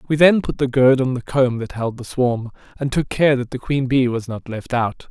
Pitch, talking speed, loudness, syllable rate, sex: 130 Hz, 270 wpm, -19 LUFS, 4.9 syllables/s, male